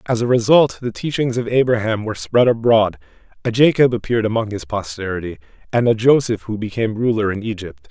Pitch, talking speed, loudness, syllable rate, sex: 115 Hz, 180 wpm, -18 LUFS, 6.1 syllables/s, male